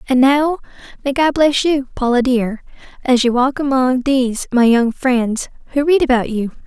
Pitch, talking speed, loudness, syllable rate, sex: 260 Hz, 180 wpm, -16 LUFS, 4.7 syllables/s, female